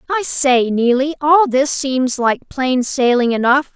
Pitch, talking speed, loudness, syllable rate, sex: 265 Hz, 160 wpm, -15 LUFS, 3.8 syllables/s, female